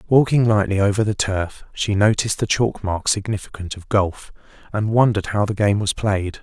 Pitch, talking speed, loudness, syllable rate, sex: 105 Hz, 185 wpm, -20 LUFS, 5.2 syllables/s, male